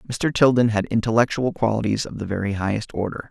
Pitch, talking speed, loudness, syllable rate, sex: 110 Hz, 180 wpm, -21 LUFS, 6.2 syllables/s, male